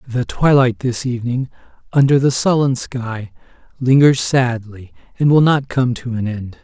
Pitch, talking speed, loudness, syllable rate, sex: 125 Hz, 155 wpm, -16 LUFS, 4.5 syllables/s, male